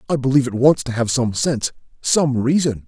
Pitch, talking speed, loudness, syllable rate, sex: 130 Hz, 210 wpm, -18 LUFS, 5.8 syllables/s, male